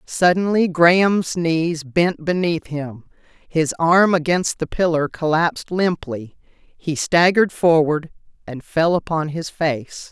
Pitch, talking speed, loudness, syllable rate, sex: 165 Hz, 125 wpm, -19 LUFS, 3.7 syllables/s, female